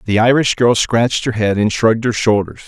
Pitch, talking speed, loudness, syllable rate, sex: 115 Hz, 225 wpm, -15 LUFS, 5.6 syllables/s, male